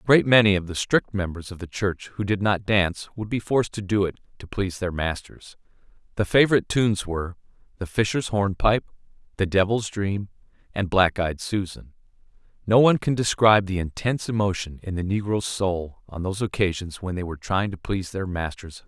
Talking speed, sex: 195 wpm, male